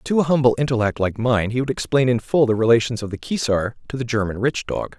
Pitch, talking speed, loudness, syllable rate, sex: 120 Hz, 255 wpm, -20 LUFS, 6.0 syllables/s, male